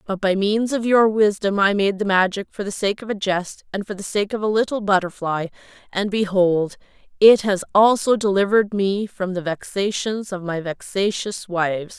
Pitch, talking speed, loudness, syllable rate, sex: 200 Hz, 180 wpm, -20 LUFS, 4.9 syllables/s, female